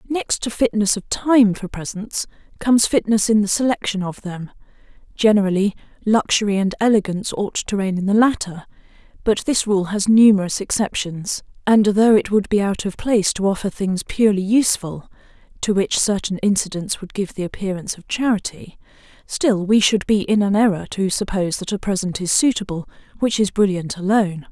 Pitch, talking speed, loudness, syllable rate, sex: 200 Hz, 175 wpm, -19 LUFS, 4.8 syllables/s, female